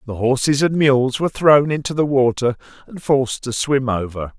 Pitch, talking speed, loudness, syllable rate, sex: 130 Hz, 190 wpm, -17 LUFS, 5.1 syllables/s, male